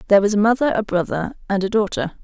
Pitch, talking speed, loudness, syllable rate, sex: 205 Hz, 240 wpm, -19 LUFS, 7.1 syllables/s, female